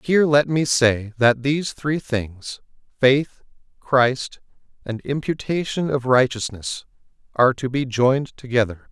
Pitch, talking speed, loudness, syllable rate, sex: 130 Hz, 130 wpm, -20 LUFS, 4.3 syllables/s, male